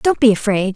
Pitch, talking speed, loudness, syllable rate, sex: 220 Hz, 240 wpm, -15 LUFS, 5.3 syllables/s, female